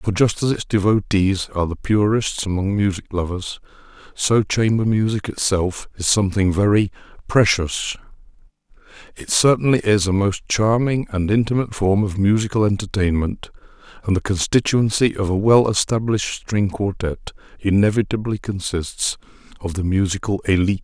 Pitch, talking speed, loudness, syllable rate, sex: 100 Hz, 130 wpm, -19 LUFS, 5.1 syllables/s, male